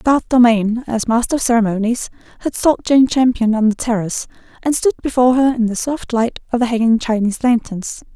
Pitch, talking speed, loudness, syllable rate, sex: 235 Hz, 190 wpm, -16 LUFS, 5.6 syllables/s, female